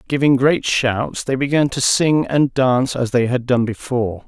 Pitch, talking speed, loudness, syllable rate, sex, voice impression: 130 Hz, 195 wpm, -17 LUFS, 4.6 syllables/s, male, masculine, middle-aged, tensed, powerful, hard, clear, cool, calm, mature, friendly, wild, lively, slightly strict